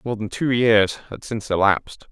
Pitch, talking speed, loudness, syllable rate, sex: 110 Hz, 200 wpm, -20 LUFS, 5.1 syllables/s, male